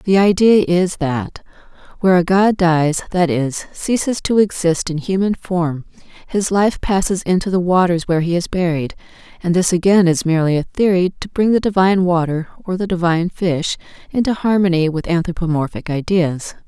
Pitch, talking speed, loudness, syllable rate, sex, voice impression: 180 Hz, 170 wpm, -17 LUFS, 5.2 syllables/s, female, feminine, adult-like, slightly intellectual, calm, slightly reassuring, elegant, slightly sweet